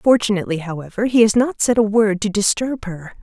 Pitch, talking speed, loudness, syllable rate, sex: 210 Hz, 205 wpm, -18 LUFS, 5.7 syllables/s, female